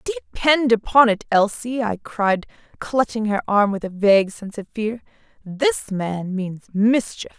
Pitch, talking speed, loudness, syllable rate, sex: 220 Hz, 155 wpm, -20 LUFS, 4.6 syllables/s, female